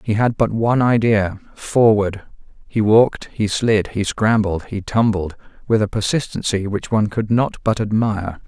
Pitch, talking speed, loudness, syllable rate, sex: 105 Hz, 155 wpm, -18 LUFS, 4.7 syllables/s, male